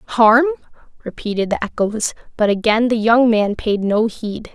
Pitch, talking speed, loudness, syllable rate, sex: 220 Hz, 160 wpm, -17 LUFS, 4.3 syllables/s, female